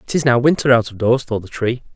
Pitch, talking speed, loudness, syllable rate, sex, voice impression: 125 Hz, 275 wpm, -17 LUFS, 5.8 syllables/s, male, very masculine, slightly adult-like, slightly thick, tensed, slightly powerful, dark, hard, muffled, fluent, raspy, cool, intellectual, slightly refreshing, sincere, calm, slightly mature, friendly, reassuring, slightly unique, elegant, slightly wild, slightly sweet, slightly lively, kind, modest